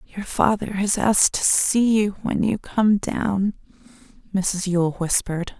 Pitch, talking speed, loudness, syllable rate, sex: 200 Hz, 150 wpm, -21 LUFS, 3.9 syllables/s, female